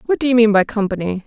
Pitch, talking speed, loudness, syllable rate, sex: 220 Hz, 285 wpm, -16 LUFS, 7.1 syllables/s, female